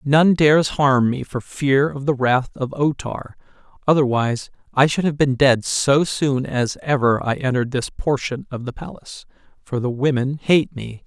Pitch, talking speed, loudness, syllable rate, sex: 135 Hz, 180 wpm, -19 LUFS, 4.6 syllables/s, male